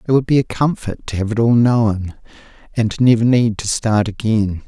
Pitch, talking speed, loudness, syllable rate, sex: 110 Hz, 205 wpm, -17 LUFS, 4.8 syllables/s, male